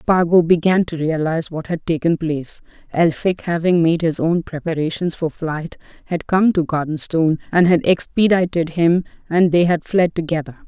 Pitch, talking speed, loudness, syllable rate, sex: 165 Hz, 155 wpm, -18 LUFS, 5.0 syllables/s, female